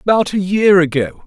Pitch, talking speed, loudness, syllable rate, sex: 185 Hz, 190 wpm, -14 LUFS, 5.0 syllables/s, male